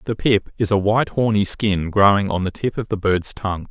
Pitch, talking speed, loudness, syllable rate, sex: 100 Hz, 245 wpm, -19 LUFS, 5.4 syllables/s, male